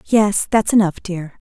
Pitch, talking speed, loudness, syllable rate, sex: 195 Hz, 165 wpm, -17 LUFS, 4.1 syllables/s, female